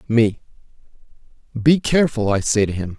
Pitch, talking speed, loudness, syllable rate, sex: 120 Hz, 140 wpm, -18 LUFS, 5.3 syllables/s, male